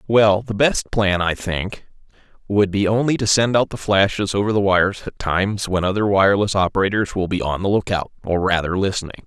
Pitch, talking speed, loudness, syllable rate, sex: 100 Hz, 200 wpm, -19 LUFS, 5.7 syllables/s, male